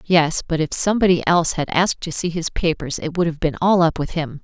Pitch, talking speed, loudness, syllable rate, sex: 165 Hz, 255 wpm, -19 LUFS, 5.9 syllables/s, female